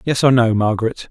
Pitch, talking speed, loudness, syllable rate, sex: 120 Hz, 215 wpm, -16 LUFS, 5.9 syllables/s, male